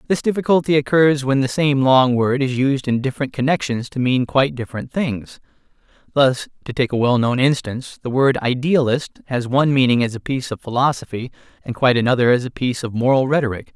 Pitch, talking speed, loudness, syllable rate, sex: 130 Hz, 190 wpm, -18 LUFS, 6.0 syllables/s, male